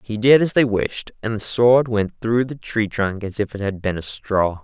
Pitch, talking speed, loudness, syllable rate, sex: 110 Hz, 260 wpm, -20 LUFS, 4.5 syllables/s, male